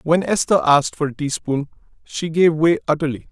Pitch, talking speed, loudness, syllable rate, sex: 155 Hz, 180 wpm, -18 LUFS, 5.5 syllables/s, male